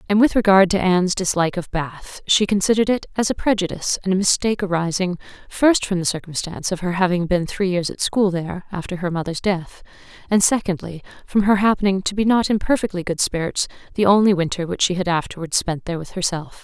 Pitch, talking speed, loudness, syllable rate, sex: 185 Hz, 205 wpm, -20 LUFS, 6.1 syllables/s, female